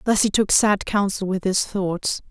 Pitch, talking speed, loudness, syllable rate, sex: 195 Hz, 210 wpm, -20 LUFS, 4.3 syllables/s, female